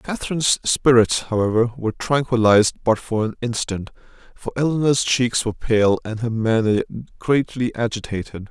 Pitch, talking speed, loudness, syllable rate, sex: 115 Hz, 135 wpm, -20 LUFS, 5.1 syllables/s, male